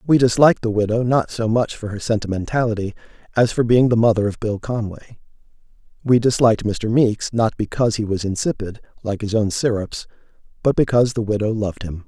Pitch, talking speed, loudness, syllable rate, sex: 110 Hz, 185 wpm, -19 LUFS, 5.9 syllables/s, male